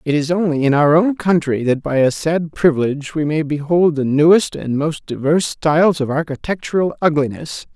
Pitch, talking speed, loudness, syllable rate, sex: 155 Hz, 185 wpm, -17 LUFS, 5.3 syllables/s, male